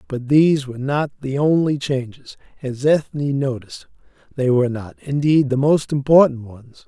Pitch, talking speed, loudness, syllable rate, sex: 135 Hz, 155 wpm, -18 LUFS, 5.0 syllables/s, male